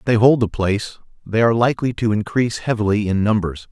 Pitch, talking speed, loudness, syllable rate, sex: 110 Hz, 210 wpm, -18 LUFS, 6.5 syllables/s, male